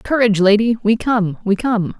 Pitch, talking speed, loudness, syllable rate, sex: 215 Hz, 180 wpm, -16 LUFS, 5.0 syllables/s, female